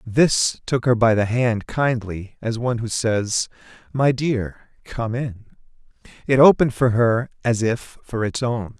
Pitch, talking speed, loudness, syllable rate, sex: 115 Hz, 165 wpm, -20 LUFS, 3.9 syllables/s, male